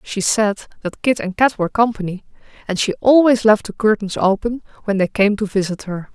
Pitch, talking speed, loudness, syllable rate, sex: 210 Hz, 205 wpm, -18 LUFS, 5.6 syllables/s, female